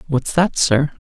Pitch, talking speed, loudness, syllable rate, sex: 145 Hz, 170 wpm, -17 LUFS, 3.8 syllables/s, male